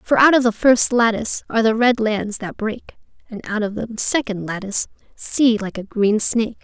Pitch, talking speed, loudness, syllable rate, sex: 220 Hz, 210 wpm, -19 LUFS, 5.2 syllables/s, female